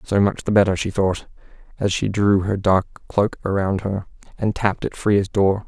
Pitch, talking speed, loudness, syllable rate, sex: 100 Hz, 200 wpm, -20 LUFS, 4.9 syllables/s, male